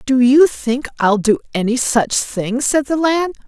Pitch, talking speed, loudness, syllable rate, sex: 255 Hz, 190 wpm, -16 LUFS, 4.1 syllables/s, female